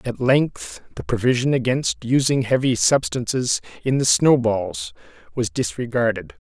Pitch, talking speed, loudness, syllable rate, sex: 125 Hz, 130 wpm, -20 LUFS, 4.3 syllables/s, male